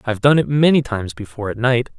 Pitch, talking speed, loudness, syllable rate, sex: 120 Hz, 240 wpm, -17 LUFS, 7.1 syllables/s, male